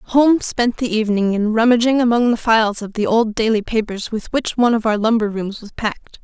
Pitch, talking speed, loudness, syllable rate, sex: 225 Hz, 220 wpm, -17 LUFS, 5.7 syllables/s, female